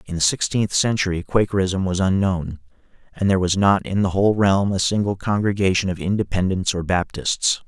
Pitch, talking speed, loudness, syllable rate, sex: 95 Hz, 170 wpm, -20 LUFS, 5.4 syllables/s, male